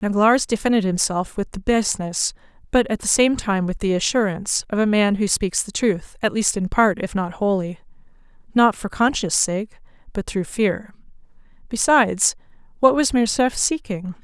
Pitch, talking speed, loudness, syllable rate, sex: 210 Hz, 165 wpm, -20 LUFS, 4.9 syllables/s, female